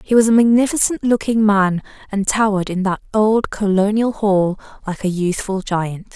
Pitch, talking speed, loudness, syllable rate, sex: 205 Hz, 165 wpm, -17 LUFS, 4.9 syllables/s, female